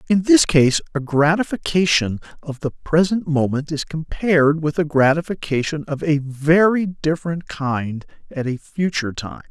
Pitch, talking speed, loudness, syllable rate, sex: 155 Hz, 145 wpm, -19 LUFS, 4.6 syllables/s, male